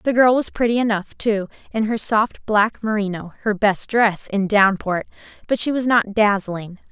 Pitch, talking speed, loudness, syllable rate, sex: 210 Hz, 165 wpm, -19 LUFS, 4.6 syllables/s, female